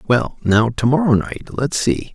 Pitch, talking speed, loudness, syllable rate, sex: 130 Hz, 195 wpm, -18 LUFS, 4.3 syllables/s, male